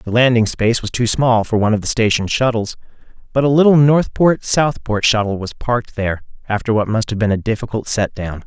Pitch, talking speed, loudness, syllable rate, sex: 115 Hz, 215 wpm, -16 LUFS, 5.8 syllables/s, male